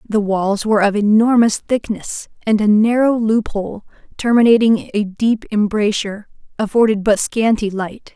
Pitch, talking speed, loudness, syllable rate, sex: 215 Hz, 130 wpm, -16 LUFS, 4.7 syllables/s, female